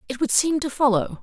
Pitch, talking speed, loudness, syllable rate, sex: 265 Hz, 245 wpm, -21 LUFS, 5.7 syllables/s, female